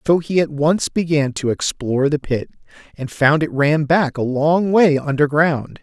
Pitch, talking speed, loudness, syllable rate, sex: 150 Hz, 185 wpm, -17 LUFS, 4.4 syllables/s, male